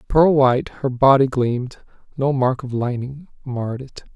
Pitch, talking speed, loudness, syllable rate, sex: 130 Hz, 160 wpm, -19 LUFS, 4.7 syllables/s, male